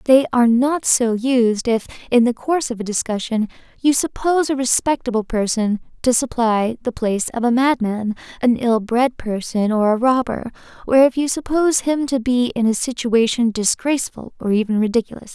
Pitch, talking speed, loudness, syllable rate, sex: 240 Hz, 175 wpm, -18 LUFS, 5.2 syllables/s, female